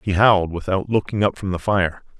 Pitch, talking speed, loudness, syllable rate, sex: 95 Hz, 220 wpm, -20 LUFS, 5.6 syllables/s, male